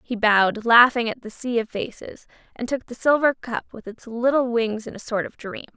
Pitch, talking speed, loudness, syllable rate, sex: 235 Hz, 230 wpm, -21 LUFS, 5.1 syllables/s, female